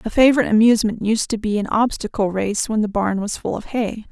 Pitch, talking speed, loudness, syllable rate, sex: 220 Hz, 235 wpm, -19 LUFS, 6.1 syllables/s, female